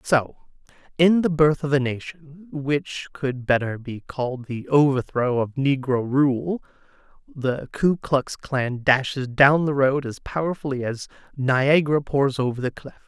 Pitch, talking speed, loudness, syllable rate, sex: 140 Hz, 150 wpm, -22 LUFS, 4.0 syllables/s, male